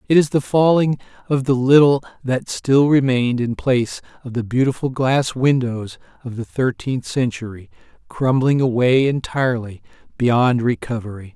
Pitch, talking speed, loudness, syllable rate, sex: 125 Hz, 135 wpm, -18 LUFS, 4.8 syllables/s, male